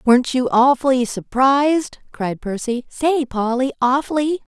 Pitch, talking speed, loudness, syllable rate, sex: 260 Hz, 120 wpm, -18 LUFS, 4.4 syllables/s, female